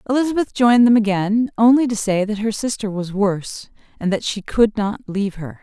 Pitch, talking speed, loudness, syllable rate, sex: 215 Hz, 205 wpm, -18 LUFS, 5.6 syllables/s, female